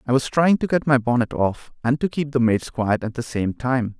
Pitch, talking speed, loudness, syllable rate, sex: 130 Hz, 270 wpm, -21 LUFS, 5.1 syllables/s, male